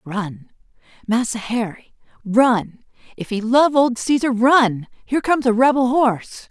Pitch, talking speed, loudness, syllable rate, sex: 235 Hz, 100 wpm, -18 LUFS, 4.1 syllables/s, female